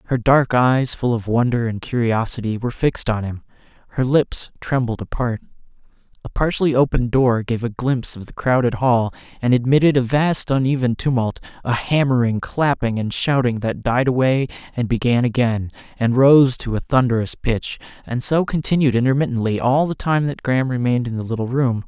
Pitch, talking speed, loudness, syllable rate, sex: 125 Hz, 175 wpm, -19 LUFS, 5.4 syllables/s, male